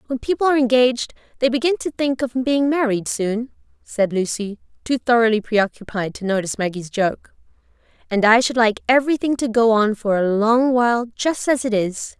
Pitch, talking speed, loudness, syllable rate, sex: 235 Hz, 180 wpm, -19 LUFS, 5.4 syllables/s, female